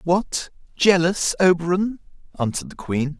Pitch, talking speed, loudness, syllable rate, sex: 175 Hz, 115 wpm, -21 LUFS, 4.6 syllables/s, male